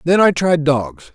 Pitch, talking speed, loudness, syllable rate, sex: 165 Hz, 210 wpm, -15 LUFS, 3.9 syllables/s, male